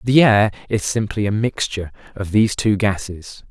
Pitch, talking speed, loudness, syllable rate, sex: 105 Hz, 170 wpm, -18 LUFS, 5.1 syllables/s, male